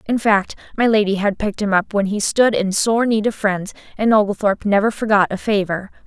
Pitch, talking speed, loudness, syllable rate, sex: 205 Hz, 220 wpm, -18 LUFS, 5.6 syllables/s, female